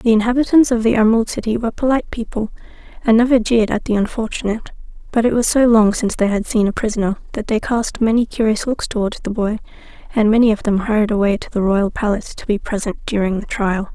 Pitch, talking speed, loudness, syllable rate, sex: 220 Hz, 220 wpm, -17 LUFS, 6.5 syllables/s, female